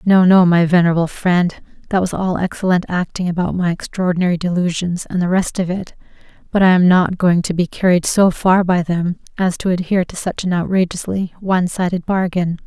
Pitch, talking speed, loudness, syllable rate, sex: 180 Hz, 195 wpm, -16 LUFS, 5.5 syllables/s, female